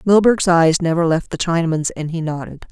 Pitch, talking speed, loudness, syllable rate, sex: 170 Hz, 200 wpm, -17 LUFS, 5.4 syllables/s, female